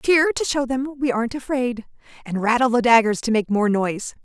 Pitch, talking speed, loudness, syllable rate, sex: 245 Hz, 210 wpm, -20 LUFS, 5.6 syllables/s, female